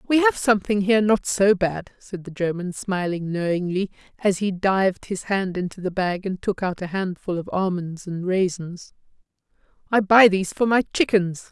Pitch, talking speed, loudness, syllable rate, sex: 190 Hz, 180 wpm, -22 LUFS, 4.9 syllables/s, female